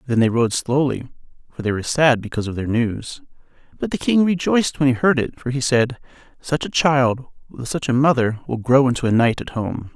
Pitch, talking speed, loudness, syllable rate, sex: 130 Hz, 225 wpm, -19 LUFS, 5.6 syllables/s, male